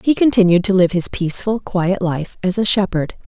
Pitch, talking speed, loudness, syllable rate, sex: 190 Hz, 195 wpm, -16 LUFS, 5.2 syllables/s, female